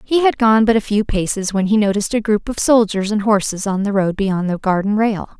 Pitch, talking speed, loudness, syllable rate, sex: 205 Hz, 255 wpm, -17 LUFS, 5.6 syllables/s, female